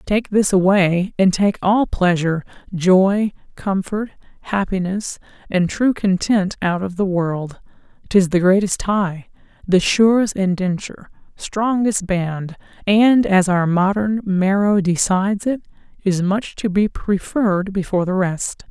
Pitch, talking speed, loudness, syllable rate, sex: 195 Hz, 130 wpm, -18 LUFS, 4.0 syllables/s, female